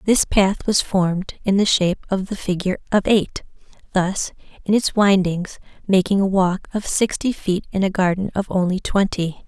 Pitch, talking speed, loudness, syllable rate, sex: 190 Hz, 175 wpm, -20 LUFS, 4.9 syllables/s, female